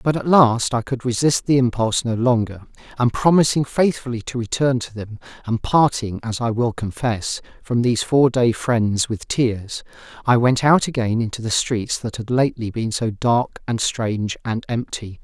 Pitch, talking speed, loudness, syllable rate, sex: 120 Hz, 185 wpm, -20 LUFS, 4.7 syllables/s, male